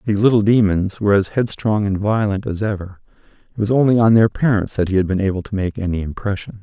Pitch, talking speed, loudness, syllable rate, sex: 100 Hz, 225 wpm, -18 LUFS, 6.2 syllables/s, male